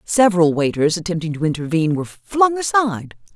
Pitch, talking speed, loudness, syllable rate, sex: 185 Hz, 145 wpm, -18 LUFS, 6.2 syllables/s, female